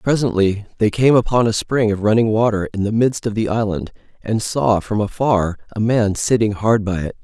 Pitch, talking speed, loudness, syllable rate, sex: 110 Hz, 205 wpm, -18 LUFS, 5.0 syllables/s, male